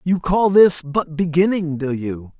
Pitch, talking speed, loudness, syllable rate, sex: 165 Hz, 175 wpm, -18 LUFS, 4.0 syllables/s, male